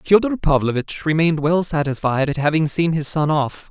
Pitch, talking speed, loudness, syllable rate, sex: 155 Hz, 180 wpm, -19 LUFS, 5.2 syllables/s, male